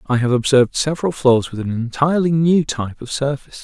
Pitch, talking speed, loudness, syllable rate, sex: 135 Hz, 200 wpm, -18 LUFS, 6.3 syllables/s, male